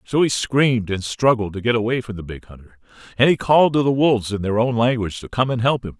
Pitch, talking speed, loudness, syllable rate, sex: 115 Hz, 270 wpm, -19 LUFS, 6.4 syllables/s, male